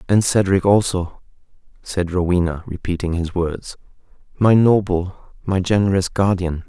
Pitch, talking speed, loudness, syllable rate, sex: 90 Hz, 110 wpm, -18 LUFS, 4.6 syllables/s, male